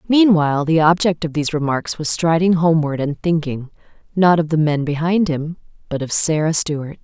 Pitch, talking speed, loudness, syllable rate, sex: 160 Hz, 180 wpm, -17 LUFS, 5.3 syllables/s, female